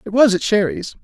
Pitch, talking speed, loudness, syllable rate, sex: 190 Hz, 230 wpm, -16 LUFS, 5.6 syllables/s, male